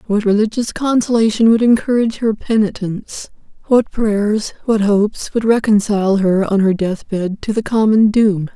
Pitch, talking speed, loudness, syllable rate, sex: 210 Hz, 155 wpm, -15 LUFS, 4.8 syllables/s, female